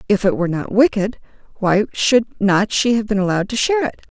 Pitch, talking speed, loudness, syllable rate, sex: 210 Hz, 215 wpm, -17 LUFS, 6.1 syllables/s, female